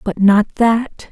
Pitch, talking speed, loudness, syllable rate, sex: 215 Hz, 160 wpm, -14 LUFS, 3.0 syllables/s, female